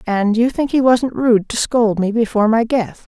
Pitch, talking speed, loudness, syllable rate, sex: 230 Hz, 230 wpm, -16 LUFS, 4.8 syllables/s, female